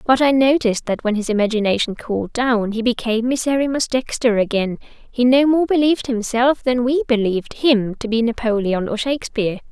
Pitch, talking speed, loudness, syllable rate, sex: 235 Hz, 165 wpm, -18 LUFS, 5.7 syllables/s, female